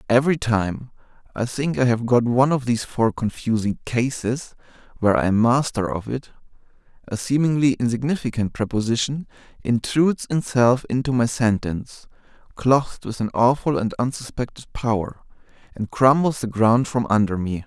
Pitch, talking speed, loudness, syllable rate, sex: 120 Hz, 145 wpm, -21 LUFS, 5.2 syllables/s, male